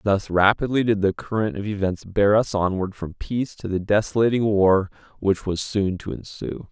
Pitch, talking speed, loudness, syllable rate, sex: 100 Hz, 190 wpm, -22 LUFS, 4.9 syllables/s, male